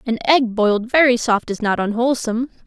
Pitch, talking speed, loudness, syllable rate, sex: 235 Hz, 180 wpm, -17 LUFS, 6.1 syllables/s, female